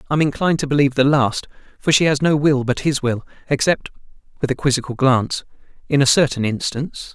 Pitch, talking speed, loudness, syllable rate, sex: 140 Hz, 185 wpm, -18 LUFS, 6.4 syllables/s, male